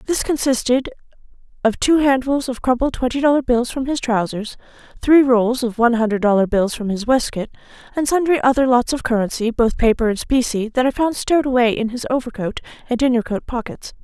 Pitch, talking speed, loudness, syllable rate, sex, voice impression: 245 Hz, 190 wpm, -18 LUFS, 5.7 syllables/s, female, feminine, slightly adult-like, slightly muffled, slightly fluent, friendly, slightly unique, slightly kind